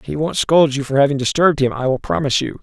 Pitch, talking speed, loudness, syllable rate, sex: 140 Hz, 275 wpm, -17 LUFS, 6.7 syllables/s, male